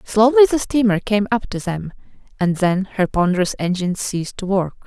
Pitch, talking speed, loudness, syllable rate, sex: 200 Hz, 185 wpm, -18 LUFS, 5.5 syllables/s, female